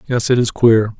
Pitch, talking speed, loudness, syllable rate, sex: 115 Hz, 240 wpm, -14 LUFS, 5.4 syllables/s, male